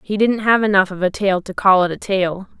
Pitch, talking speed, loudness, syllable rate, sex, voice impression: 195 Hz, 275 wpm, -17 LUFS, 5.4 syllables/s, female, feminine, adult-like, slightly powerful, slightly intellectual, slightly calm